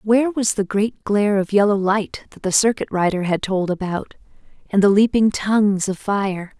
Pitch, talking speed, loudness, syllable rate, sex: 205 Hz, 180 wpm, -19 LUFS, 4.9 syllables/s, female